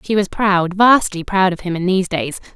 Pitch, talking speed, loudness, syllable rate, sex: 185 Hz, 235 wpm, -16 LUFS, 5.1 syllables/s, female